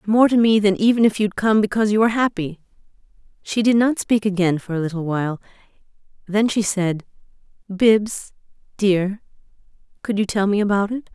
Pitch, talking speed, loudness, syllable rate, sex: 205 Hz, 165 wpm, -19 LUFS, 5.6 syllables/s, female